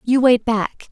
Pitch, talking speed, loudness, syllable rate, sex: 235 Hz, 195 wpm, -17 LUFS, 3.7 syllables/s, female